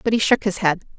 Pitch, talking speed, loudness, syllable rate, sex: 200 Hz, 305 wpm, -19 LUFS, 6.7 syllables/s, female